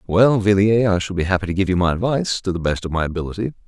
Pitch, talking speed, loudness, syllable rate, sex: 95 Hz, 275 wpm, -19 LUFS, 7.2 syllables/s, male